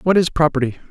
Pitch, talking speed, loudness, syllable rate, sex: 155 Hz, 200 wpm, -17 LUFS, 6.9 syllables/s, male